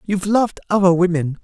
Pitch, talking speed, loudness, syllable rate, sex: 185 Hz, 165 wpm, -17 LUFS, 6.6 syllables/s, male